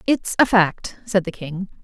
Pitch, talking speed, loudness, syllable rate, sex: 195 Hz, 195 wpm, -20 LUFS, 4.0 syllables/s, female